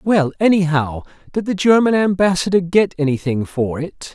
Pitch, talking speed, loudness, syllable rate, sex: 170 Hz, 145 wpm, -17 LUFS, 4.8 syllables/s, male